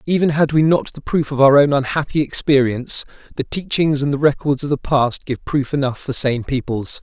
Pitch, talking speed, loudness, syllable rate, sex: 140 Hz, 215 wpm, -17 LUFS, 5.3 syllables/s, male